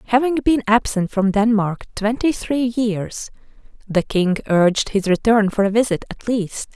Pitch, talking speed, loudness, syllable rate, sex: 215 Hz, 160 wpm, -19 LUFS, 4.4 syllables/s, female